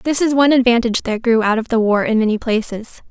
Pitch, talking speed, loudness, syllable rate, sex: 235 Hz, 250 wpm, -16 LUFS, 6.5 syllables/s, female